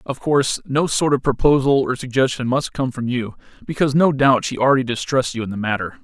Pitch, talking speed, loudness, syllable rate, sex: 130 Hz, 210 wpm, -19 LUFS, 5.9 syllables/s, male